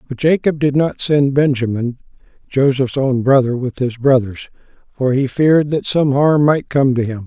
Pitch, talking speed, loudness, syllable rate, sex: 135 Hz, 180 wpm, -15 LUFS, 4.7 syllables/s, male